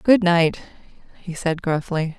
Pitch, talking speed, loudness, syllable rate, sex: 175 Hz, 135 wpm, -20 LUFS, 4.0 syllables/s, female